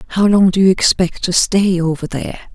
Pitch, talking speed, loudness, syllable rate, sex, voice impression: 185 Hz, 210 wpm, -14 LUFS, 5.0 syllables/s, female, feminine, adult-like, slightly relaxed, slightly weak, soft, slightly raspy, intellectual, calm, reassuring, elegant, slightly kind, modest